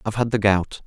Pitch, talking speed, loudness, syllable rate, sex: 105 Hz, 280 wpm, -21 LUFS, 6.6 syllables/s, male